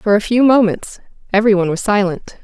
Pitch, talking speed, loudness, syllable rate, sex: 205 Hz, 195 wpm, -14 LUFS, 6.3 syllables/s, female